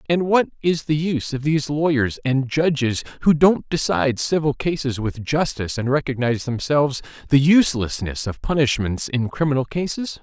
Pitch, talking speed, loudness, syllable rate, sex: 140 Hz, 160 wpm, -20 LUFS, 5.4 syllables/s, male